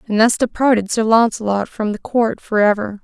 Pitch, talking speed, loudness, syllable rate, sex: 220 Hz, 200 wpm, -17 LUFS, 5.2 syllables/s, female